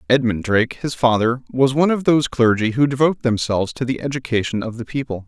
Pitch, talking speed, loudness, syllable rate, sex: 125 Hz, 205 wpm, -19 LUFS, 6.4 syllables/s, male